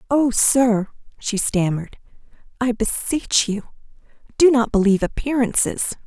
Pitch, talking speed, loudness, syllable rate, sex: 235 Hz, 110 wpm, -19 LUFS, 4.6 syllables/s, female